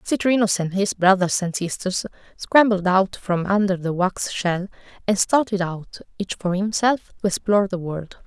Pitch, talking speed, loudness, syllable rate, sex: 195 Hz, 165 wpm, -21 LUFS, 4.6 syllables/s, female